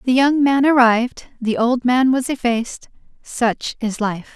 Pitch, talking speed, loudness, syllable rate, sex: 245 Hz, 165 wpm, -17 LUFS, 4.2 syllables/s, female